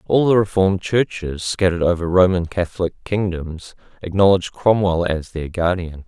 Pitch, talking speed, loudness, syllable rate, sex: 90 Hz, 140 wpm, -19 LUFS, 5.1 syllables/s, male